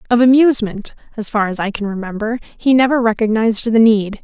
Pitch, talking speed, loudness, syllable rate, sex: 225 Hz, 185 wpm, -15 LUFS, 5.9 syllables/s, female